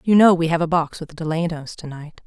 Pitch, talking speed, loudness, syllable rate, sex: 165 Hz, 265 wpm, -20 LUFS, 6.1 syllables/s, female